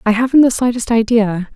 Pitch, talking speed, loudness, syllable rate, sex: 230 Hz, 195 wpm, -14 LUFS, 5.6 syllables/s, female